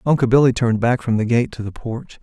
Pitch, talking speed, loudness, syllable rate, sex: 120 Hz, 270 wpm, -18 LUFS, 6.2 syllables/s, male